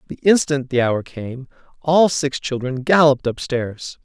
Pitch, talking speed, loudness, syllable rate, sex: 135 Hz, 165 wpm, -18 LUFS, 4.3 syllables/s, male